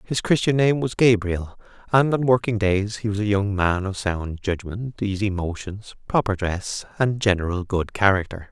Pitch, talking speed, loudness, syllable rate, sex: 105 Hz, 175 wpm, -22 LUFS, 4.6 syllables/s, male